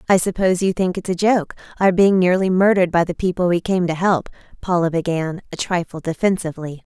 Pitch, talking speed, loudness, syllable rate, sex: 180 Hz, 200 wpm, -19 LUFS, 6.0 syllables/s, female